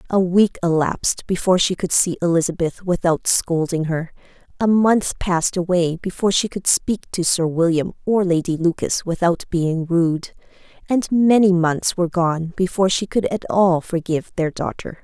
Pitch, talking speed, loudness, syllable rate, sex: 175 Hz, 165 wpm, -19 LUFS, 4.8 syllables/s, female